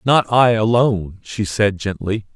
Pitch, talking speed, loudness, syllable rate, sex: 105 Hz, 155 wpm, -17 LUFS, 4.2 syllables/s, male